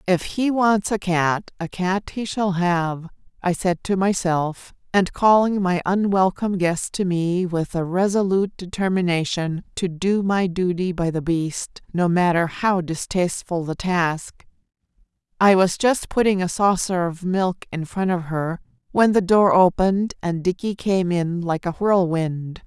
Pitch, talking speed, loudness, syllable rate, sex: 180 Hz, 160 wpm, -21 LUFS, 4.1 syllables/s, female